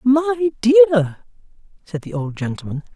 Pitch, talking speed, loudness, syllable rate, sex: 205 Hz, 120 wpm, -17 LUFS, 6.4 syllables/s, female